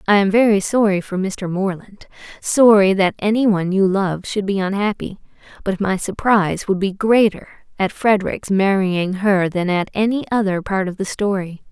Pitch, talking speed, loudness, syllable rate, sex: 195 Hz, 165 wpm, -18 LUFS, 4.8 syllables/s, female